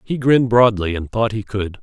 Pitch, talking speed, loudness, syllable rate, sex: 110 Hz, 230 wpm, -17 LUFS, 5.2 syllables/s, male